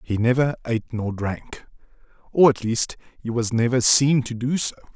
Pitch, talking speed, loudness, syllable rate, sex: 120 Hz, 180 wpm, -21 LUFS, 5.1 syllables/s, male